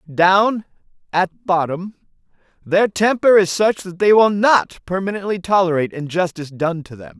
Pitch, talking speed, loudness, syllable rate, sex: 185 Hz, 140 wpm, -17 LUFS, 4.8 syllables/s, male